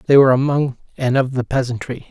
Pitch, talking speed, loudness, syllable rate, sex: 130 Hz, 200 wpm, -18 LUFS, 6.3 syllables/s, male